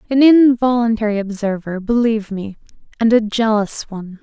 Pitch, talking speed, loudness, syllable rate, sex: 220 Hz, 115 wpm, -16 LUFS, 5.3 syllables/s, female